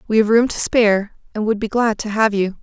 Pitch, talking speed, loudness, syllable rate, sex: 215 Hz, 275 wpm, -17 LUFS, 5.7 syllables/s, female